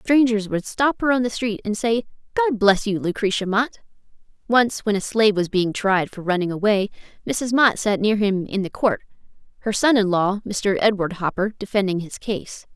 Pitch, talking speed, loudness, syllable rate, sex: 210 Hz, 200 wpm, -21 LUFS, 5.1 syllables/s, female